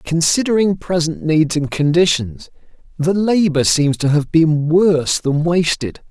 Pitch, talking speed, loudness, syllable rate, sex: 160 Hz, 140 wpm, -16 LUFS, 4.2 syllables/s, male